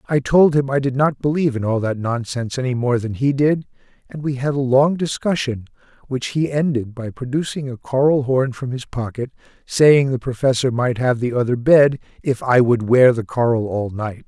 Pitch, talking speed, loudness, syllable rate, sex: 130 Hz, 205 wpm, -19 LUFS, 5.1 syllables/s, male